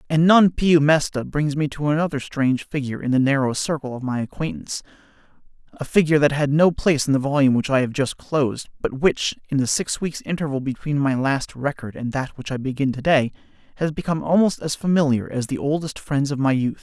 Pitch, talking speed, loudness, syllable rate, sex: 145 Hz, 220 wpm, -21 LUFS, 5.9 syllables/s, male